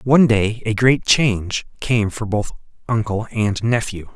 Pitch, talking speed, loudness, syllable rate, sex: 110 Hz, 160 wpm, -19 LUFS, 4.3 syllables/s, male